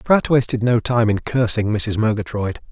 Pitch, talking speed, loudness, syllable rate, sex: 115 Hz, 175 wpm, -19 LUFS, 4.7 syllables/s, male